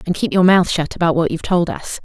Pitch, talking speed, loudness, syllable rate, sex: 175 Hz, 295 wpm, -16 LUFS, 6.3 syllables/s, female